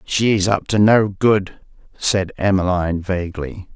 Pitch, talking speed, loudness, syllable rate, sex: 95 Hz, 130 wpm, -18 LUFS, 4.1 syllables/s, male